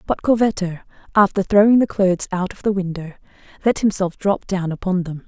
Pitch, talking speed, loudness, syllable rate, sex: 190 Hz, 180 wpm, -19 LUFS, 5.7 syllables/s, female